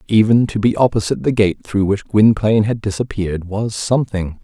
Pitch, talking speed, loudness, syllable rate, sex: 105 Hz, 175 wpm, -16 LUFS, 5.6 syllables/s, male